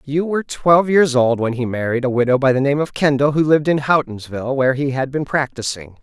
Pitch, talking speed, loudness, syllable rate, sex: 140 Hz, 240 wpm, -17 LUFS, 6.1 syllables/s, male